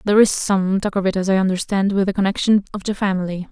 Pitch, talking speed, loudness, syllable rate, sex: 195 Hz, 255 wpm, -19 LUFS, 6.7 syllables/s, female